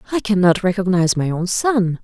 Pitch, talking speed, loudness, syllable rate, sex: 190 Hz, 175 wpm, -17 LUFS, 5.6 syllables/s, female